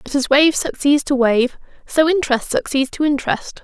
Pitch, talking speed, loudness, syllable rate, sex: 280 Hz, 180 wpm, -17 LUFS, 5.1 syllables/s, female